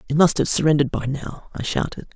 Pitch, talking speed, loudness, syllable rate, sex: 145 Hz, 225 wpm, -21 LUFS, 6.4 syllables/s, male